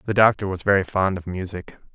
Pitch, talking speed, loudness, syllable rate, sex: 95 Hz, 215 wpm, -22 LUFS, 6.0 syllables/s, male